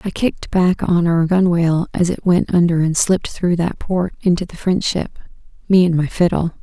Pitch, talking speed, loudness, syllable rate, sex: 175 Hz, 200 wpm, -17 LUFS, 5.2 syllables/s, female